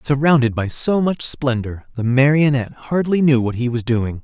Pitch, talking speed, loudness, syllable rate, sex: 130 Hz, 185 wpm, -18 LUFS, 5.0 syllables/s, male